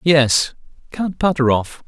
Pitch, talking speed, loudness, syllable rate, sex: 145 Hz, 95 wpm, -18 LUFS, 3.6 syllables/s, male